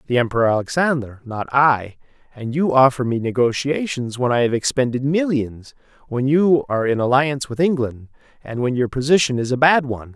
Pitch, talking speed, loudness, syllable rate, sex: 130 Hz, 175 wpm, -19 LUFS, 5.5 syllables/s, male